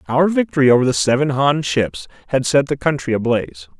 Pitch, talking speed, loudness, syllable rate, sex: 130 Hz, 190 wpm, -17 LUFS, 5.7 syllables/s, male